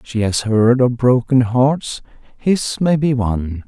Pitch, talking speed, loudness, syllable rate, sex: 125 Hz, 165 wpm, -16 LUFS, 3.8 syllables/s, male